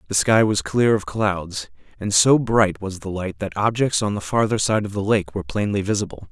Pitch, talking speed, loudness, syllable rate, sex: 100 Hz, 230 wpm, -20 LUFS, 5.2 syllables/s, male